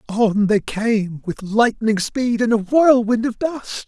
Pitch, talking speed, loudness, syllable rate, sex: 225 Hz, 170 wpm, -18 LUFS, 3.6 syllables/s, male